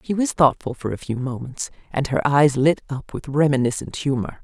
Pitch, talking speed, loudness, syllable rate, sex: 135 Hz, 205 wpm, -21 LUFS, 5.2 syllables/s, female